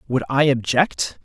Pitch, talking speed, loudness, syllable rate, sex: 135 Hz, 145 wpm, -19 LUFS, 4.1 syllables/s, male